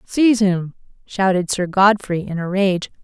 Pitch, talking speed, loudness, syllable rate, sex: 190 Hz, 160 wpm, -18 LUFS, 4.3 syllables/s, female